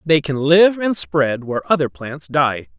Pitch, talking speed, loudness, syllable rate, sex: 145 Hz, 195 wpm, -17 LUFS, 4.3 syllables/s, male